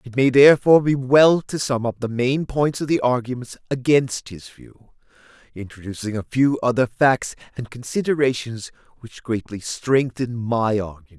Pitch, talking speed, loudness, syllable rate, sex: 125 Hz, 155 wpm, -20 LUFS, 4.8 syllables/s, male